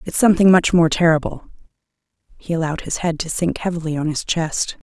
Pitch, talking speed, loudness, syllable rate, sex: 170 Hz, 185 wpm, -18 LUFS, 6.0 syllables/s, female